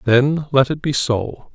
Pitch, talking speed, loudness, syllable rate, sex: 135 Hz, 195 wpm, -18 LUFS, 3.7 syllables/s, male